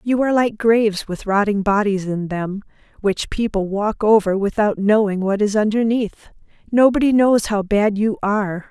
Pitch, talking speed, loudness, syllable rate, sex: 210 Hz, 165 wpm, -18 LUFS, 4.8 syllables/s, female